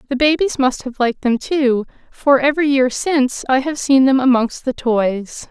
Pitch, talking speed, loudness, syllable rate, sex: 260 Hz, 195 wpm, -16 LUFS, 4.8 syllables/s, female